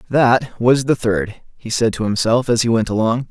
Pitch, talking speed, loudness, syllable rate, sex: 115 Hz, 220 wpm, -17 LUFS, 4.7 syllables/s, male